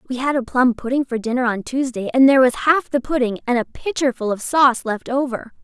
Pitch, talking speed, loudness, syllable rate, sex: 255 Hz, 235 wpm, -19 LUFS, 5.9 syllables/s, female